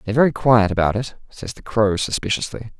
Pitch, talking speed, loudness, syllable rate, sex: 110 Hz, 195 wpm, -19 LUFS, 6.0 syllables/s, male